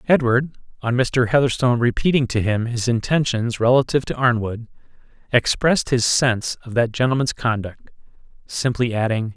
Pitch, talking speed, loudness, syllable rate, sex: 120 Hz, 135 wpm, -20 LUFS, 5.3 syllables/s, male